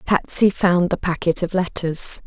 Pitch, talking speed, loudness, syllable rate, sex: 180 Hz, 160 wpm, -19 LUFS, 4.2 syllables/s, female